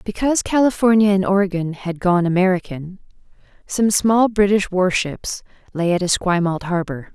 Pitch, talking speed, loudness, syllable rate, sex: 190 Hz, 125 wpm, -18 LUFS, 4.9 syllables/s, female